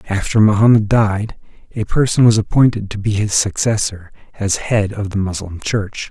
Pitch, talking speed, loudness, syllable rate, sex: 105 Hz, 165 wpm, -16 LUFS, 4.9 syllables/s, male